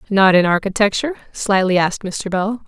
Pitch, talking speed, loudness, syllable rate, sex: 200 Hz, 155 wpm, -17 LUFS, 5.7 syllables/s, female